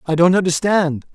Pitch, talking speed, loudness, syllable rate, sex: 170 Hz, 155 wpm, -16 LUFS, 5.2 syllables/s, male